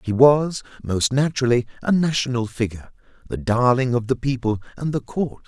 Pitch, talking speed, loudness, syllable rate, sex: 125 Hz, 165 wpm, -21 LUFS, 5.4 syllables/s, male